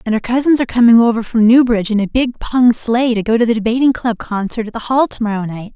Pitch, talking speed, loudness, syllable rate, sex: 230 Hz, 260 wpm, -14 LUFS, 6.4 syllables/s, female